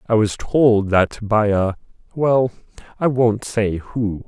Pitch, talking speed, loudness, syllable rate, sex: 110 Hz, 140 wpm, -19 LUFS, 3.5 syllables/s, male